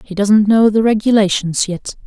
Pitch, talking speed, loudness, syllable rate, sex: 205 Hz, 175 wpm, -13 LUFS, 4.7 syllables/s, female